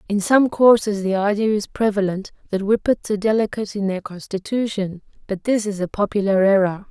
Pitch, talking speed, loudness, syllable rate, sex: 205 Hz, 175 wpm, -20 LUFS, 5.6 syllables/s, female